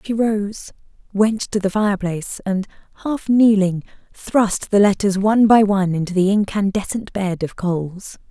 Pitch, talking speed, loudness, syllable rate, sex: 200 Hz, 150 wpm, -18 LUFS, 4.7 syllables/s, female